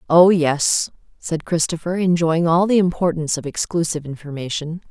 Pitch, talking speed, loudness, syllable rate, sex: 165 Hz, 135 wpm, -19 LUFS, 5.2 syllables/s, female